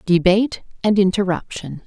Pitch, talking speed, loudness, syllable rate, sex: 190 Hz, 95 wpm, -18 LUFS, 5.0 syllables/s, female